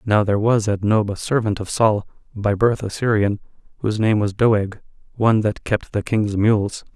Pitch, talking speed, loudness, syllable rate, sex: 105 Hz, 200 wpm, -20 LUFS, 4.9 syllables/s, male